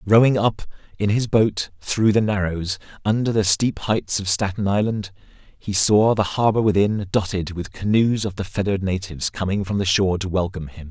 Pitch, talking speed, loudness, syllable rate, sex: 100 Hz, 185 wpm, -21 LUFS, 5.3 syllables/s, male